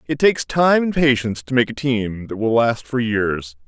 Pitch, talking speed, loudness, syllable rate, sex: 125 Hz, 230 wpm, -19 LUFS, 4.9 syllables/s, male